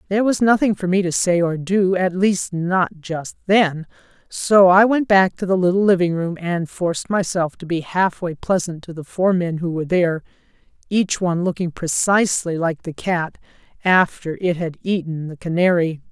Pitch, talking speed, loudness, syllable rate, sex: 180 Hz, 180 wpm, -19 LUFS, 4.9 syllables/s, female